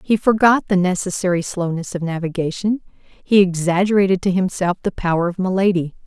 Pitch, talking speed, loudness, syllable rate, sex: 185 Hz, 150 wpm, -18 LUFS, 5.5 syllables/s, female